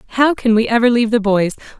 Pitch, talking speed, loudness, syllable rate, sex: 230 Hz, 235 wpm, -15 LUFS, 5.9 syllables/s, female